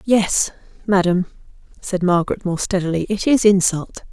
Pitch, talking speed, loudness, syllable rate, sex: 190 Hz, 130 wpm, -18 LUFS, 4.8 syllables/s, female